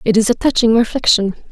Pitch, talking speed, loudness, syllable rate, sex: 225 Hz, 200 wpm, -14 LUFS, 6.2 syllables/s, female